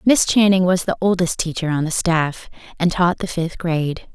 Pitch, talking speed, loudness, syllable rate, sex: 175 Hz, 205 wpm, -19 LUFS, 4.9 syllables/s, female